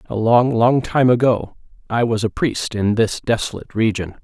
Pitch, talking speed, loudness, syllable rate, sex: 115 Hz, 185 wpm, -18 LUFS, 4.8 syllables/s, male